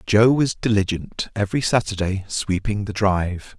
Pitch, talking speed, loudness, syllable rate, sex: 105 Hz, 135 wpm, -21 LUFS, 4.7 syllables/s, male